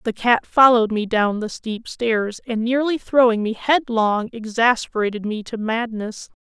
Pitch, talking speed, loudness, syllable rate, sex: 230 Hz, 160 wpm, -20 LUFS, 4.4 syllables/s, female